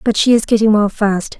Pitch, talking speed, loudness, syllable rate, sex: 215 Hz, 260 wpm, -14 LUFS, 5.4 syllables/s, female